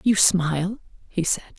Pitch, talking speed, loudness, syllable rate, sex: 185 Hz, 150 wpm, -22 LUFS, 4.7 syllables/s, female